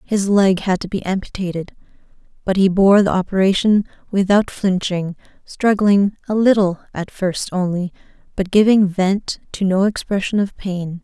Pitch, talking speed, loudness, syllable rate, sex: 195 Hz, 145 wpm, -17 LUFS, 4.6 syllables/s, female